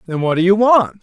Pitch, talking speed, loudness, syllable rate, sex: 195 Hz, 295 wpm, -14 LUFS, 5.8 syllables/s, male